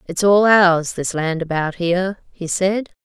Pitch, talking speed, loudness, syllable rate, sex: 180 Hz, 180 wpm, -17 LUFS, 4.0 syllables/s, female